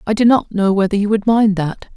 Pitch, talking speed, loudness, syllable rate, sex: 205 Hz, 275 wpm, -15 LUFS, 5.7 syllables/s, female